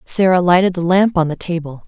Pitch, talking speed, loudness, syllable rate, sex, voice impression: 175 Hz, 225 wpm, -15 LUFS, 5.8 syllables/s, female, very feminine, very adult-like, very thin, slightly tensed, weak, bright, soft, very clear, slightly halting, slightly raspy, cute, slightly cool, very intellectual, refreshing, very sincere, very calm, very friendly, very reassuring, unique, very elegant, slightly wild, very sweet, lively, very kind, slightly sharp, modest